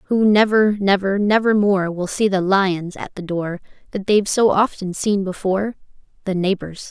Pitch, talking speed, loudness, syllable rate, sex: 195 Hz, 165 wpm, -18 LUFS, 5.0 syllables/s, female